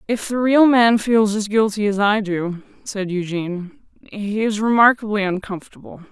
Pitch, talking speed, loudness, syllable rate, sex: 210 Hz, 155 wpm, -18 LUFS, 4.7 syllables/s, female